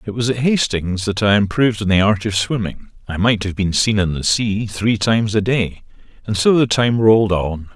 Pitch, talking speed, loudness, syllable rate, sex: 105 Hz, 230 wpm, -17 LUFS, 5.1 syllables/s, male